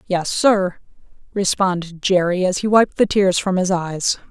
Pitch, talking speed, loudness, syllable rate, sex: 185 Hz, 165 wpm, -18 LUFS, 4.2 syllables/s, female